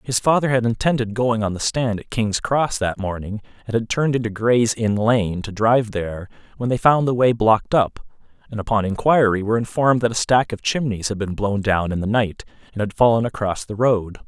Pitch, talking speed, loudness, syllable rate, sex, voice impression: 110 Hz, 225 wpm, -20 LUFS, 5.5 syllables/s, male, masculine, adult-like, slightly fluent, cool, slightly intellectual, slightly calm, slightly friendly, reassuring